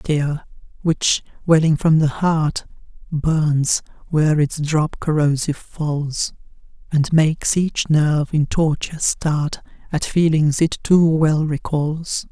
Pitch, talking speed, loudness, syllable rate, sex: 155 Hz, 125 wpm, -19 LUFS, 3.7 syllables/s, female